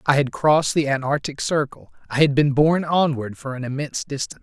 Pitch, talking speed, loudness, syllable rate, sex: 145 Hz, 205 wpm, -21 LUFS, 6.0 syllables/s, male